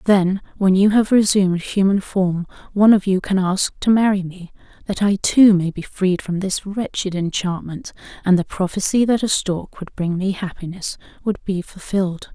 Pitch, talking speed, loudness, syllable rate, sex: 190 Hz, 185 wpm, -19 LUFS, 4.8 syllables/s, female